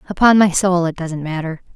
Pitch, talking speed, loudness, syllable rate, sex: 175 Hz, 205 wpm, -16 LUFS, 5.5 syllables/s, female